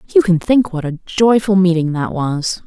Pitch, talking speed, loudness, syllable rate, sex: 185 Hz, 200 wpm, -15 LUFS, 4.8 syllables/s, female